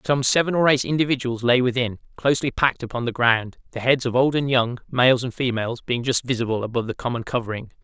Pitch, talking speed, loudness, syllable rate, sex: 125 Hz, 215 wpm, -21 LUFS, 6.4 syllables/s, male